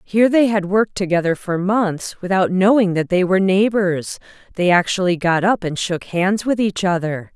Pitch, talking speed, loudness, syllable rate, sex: 190 Hz, 190 wpm, -18 LUFS, 4.9 syllables/s, female